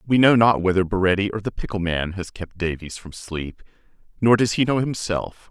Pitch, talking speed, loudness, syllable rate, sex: 100 Hz, 205 wpm, -21 LUFS, 5.2 syllables/s, male